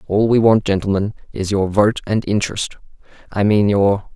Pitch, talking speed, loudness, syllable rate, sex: 100 Hz, 160 wpm, -17 LUFS, 5.1 syllables/s, male